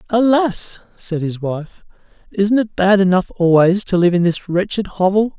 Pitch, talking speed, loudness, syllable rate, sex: 190 Hz, 165 wpm, -16 LUFS, 4.4 syllables/s, male